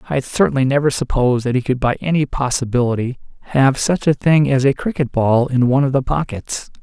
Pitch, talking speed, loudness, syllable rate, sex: 135 Hz, 210 wpm, -17 LUFS, 6.0 syllables/s, male